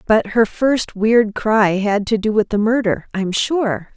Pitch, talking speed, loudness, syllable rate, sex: 215 Hz, 195 wpm, -17 LUFS, 3.7 syllables/s, female